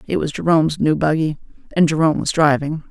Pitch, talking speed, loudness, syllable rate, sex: 155 Hz, 185 wpm, -18 LUFS, 6.4 syllables/s, female